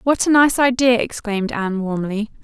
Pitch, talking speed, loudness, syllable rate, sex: 230 Hz, 170 wpm, -18 LUFS, 5.4 syllables/s, female